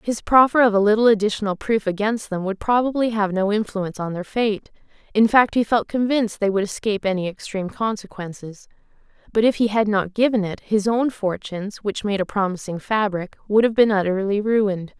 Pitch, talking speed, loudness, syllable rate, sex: 210 Hz, 190 wpm, -20 LUFS, 5.6 syllables/s, female